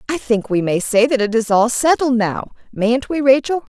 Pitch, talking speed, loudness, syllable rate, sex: 240 Hz, 205 wpm, -16 LUFS, 5.0 syllables/s, female